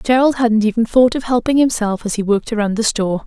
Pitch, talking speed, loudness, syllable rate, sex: 225 Hz, 240 wpm, -16 LUFS, 6.2 syllables/s, female